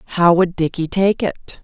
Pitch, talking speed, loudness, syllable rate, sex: 175 Hz, 185 wpm, -17 LUFS, 4.7 syllables/s, female